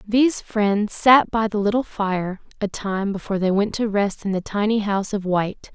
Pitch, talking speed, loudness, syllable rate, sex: 205 Hz, 210 wpm, -21 LUFS, 5.0 syllables/s, female